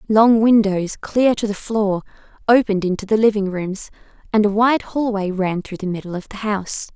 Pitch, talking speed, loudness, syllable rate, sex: 205 Hz, 190 wpm, -19 LUFS, 5.2 syllables/s, female